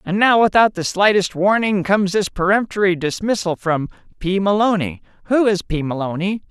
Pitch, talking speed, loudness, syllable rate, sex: 190 Hz, 155 wpm, -18 LUFS, 5.2 syllables/s, male